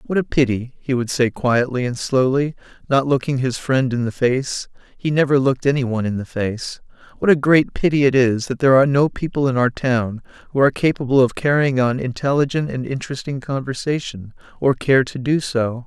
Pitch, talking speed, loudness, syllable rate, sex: 130 Hz, 195 wpm, -19 LUFS, 5.0 syllables/s, male